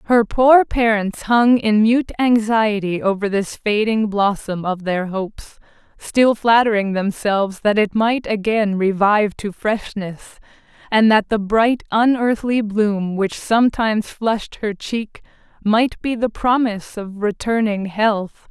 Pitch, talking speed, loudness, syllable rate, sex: 215 Hz, 135 wpm, -18 LUFS, 4.0 syllables/s, female